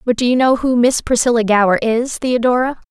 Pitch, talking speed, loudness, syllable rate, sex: 240 Hz, 205 wpm, -15 LUFS, 5.5 syllables/s, female